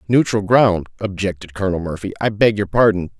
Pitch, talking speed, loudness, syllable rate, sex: 100 Hz, 170 wpm, -18 LUFS, 5.8 syllables/s, male